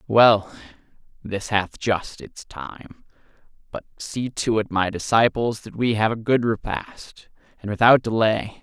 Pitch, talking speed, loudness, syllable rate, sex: 110 Hz, 145 wpm, -21 LUFS, 3.9 syllables/s, male